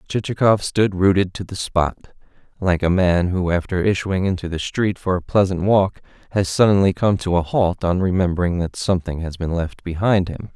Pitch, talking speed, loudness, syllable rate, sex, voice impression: 90 Hz, 195 wpm, -19 LUFS, 5.2 syllables/s, male, very masculine, adult-like, cool, slightly intellectual, sincere, calm